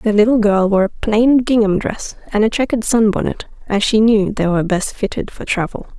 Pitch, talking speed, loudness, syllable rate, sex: 215 Hz, 210 wpm, -16 LUFS, 5.2 syllables/s, female